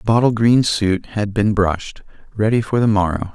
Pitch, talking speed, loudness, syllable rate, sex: 105 Hz, 200 wpm, -17 LUFS, 5.2 syllables/s, male